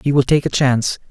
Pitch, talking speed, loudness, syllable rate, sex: 135 Hz, 270 wpm, -16 LUFS, 6.7 syllables/s, male